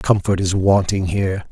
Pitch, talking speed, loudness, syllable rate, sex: 95 Hz, 160 wpm, -18 LUFS, 4.8 syllables/s, male